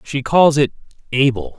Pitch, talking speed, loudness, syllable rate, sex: 135 Hz, 150 wpm, -16 LUFS, 4.6 syllables/s, male